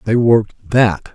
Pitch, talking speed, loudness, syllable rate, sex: 110 Hz, 155 wpm, -15 LUFS, 4.3 syllables/s, male